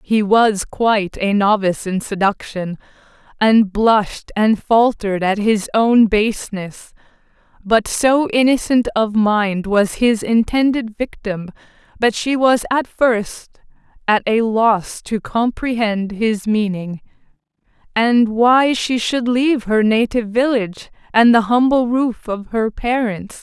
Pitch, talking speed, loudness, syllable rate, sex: 220 Hz, 130 wpm, -16 LUFS, 3.9 syllables/s, female